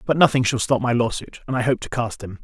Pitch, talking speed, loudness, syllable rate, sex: 120 Hz, 320 wpm, -21 LUFS, 6.2 syllables/s, male